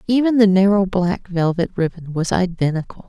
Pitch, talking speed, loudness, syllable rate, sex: 185 Hz, 155 wpm, -18 LUFS, 5.1 syllables/s, female